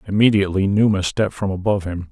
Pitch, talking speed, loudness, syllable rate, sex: 100 Hz, 170 wpm, -19 LUFS, 7.3 syllables/s, male